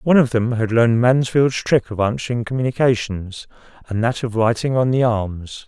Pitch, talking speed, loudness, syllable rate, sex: 120 Hz, 180 wpm, -18 LUFS, 5.2 syllables/s, male